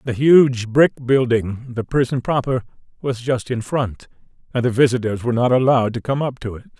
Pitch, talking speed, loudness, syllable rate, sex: 125 Hz, 195 wpm, -19 LUFS, 5.3 syllables/s, male